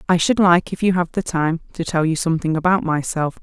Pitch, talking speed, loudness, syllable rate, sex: 170 Hz, 245 wpm, -19 LUFS, 5.7 syllables/s, female